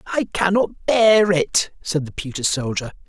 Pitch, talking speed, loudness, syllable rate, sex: 175 Hz, 155 wpm, -19 LUFS, 4.0 syllables/s, male